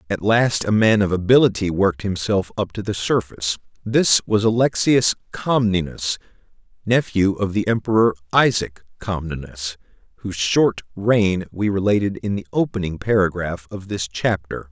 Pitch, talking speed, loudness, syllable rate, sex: 100 Hz, 140 wpm, -20 LUFS, 4.8 syllables/s, male